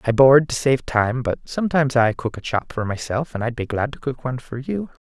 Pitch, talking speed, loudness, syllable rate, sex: 130 Hz, 260 wpm, -21 LUFS, 5.7 syllables/s, male